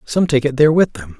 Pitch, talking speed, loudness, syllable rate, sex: 140 Hz, 300 wpm, -15 LUFS, 6.4 syllables/s, male